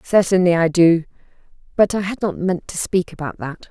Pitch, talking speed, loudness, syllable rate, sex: 175 Hz, 195 wpm, -18 LUFS, 5.2 syllables/s, female